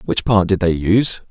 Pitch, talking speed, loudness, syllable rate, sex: 95 Hz, 230 wpm, -16 LUFS, 5.4 syllables/s, male